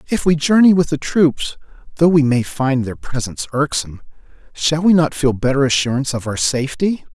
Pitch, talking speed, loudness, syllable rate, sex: 140 Hz, 185 wpm, -17 LUFS, 5.6 syllables/s, male